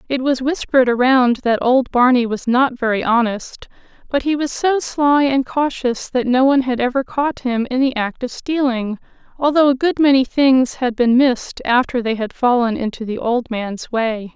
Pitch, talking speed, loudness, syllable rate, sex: 250 Hz, 195 wpm, -17 LUFS, 4.7 syllables/s, female